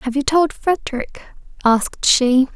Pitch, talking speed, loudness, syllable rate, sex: 270 Hz, 140 wpm, -17 LUFS, 4.3 syllables/s, female